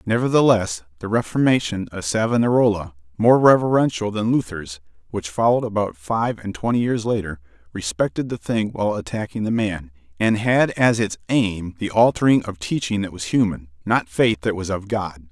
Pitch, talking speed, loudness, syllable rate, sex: 105 Hz, 165 wpm, -20 LUFS, 5.2 syllables/s, male